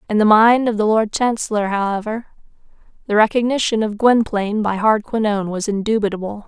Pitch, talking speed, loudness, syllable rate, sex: 215 Hz, 150 wpm, -17 LUFS, 5.8 syllables/s, female